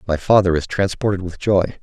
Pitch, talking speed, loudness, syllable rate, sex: 95 Hz, 195 wpm, -18 LUFS, 6.0 syllables/s, male